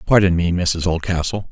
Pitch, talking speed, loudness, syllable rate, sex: 90 Hz, 160 wpm, -18 LUFS, 5.2 syllables/s, male